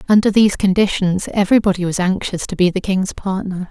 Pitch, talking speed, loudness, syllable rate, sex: 190 Hz, 180 wpm, -17 LUFS, 6.0 syllables/s, female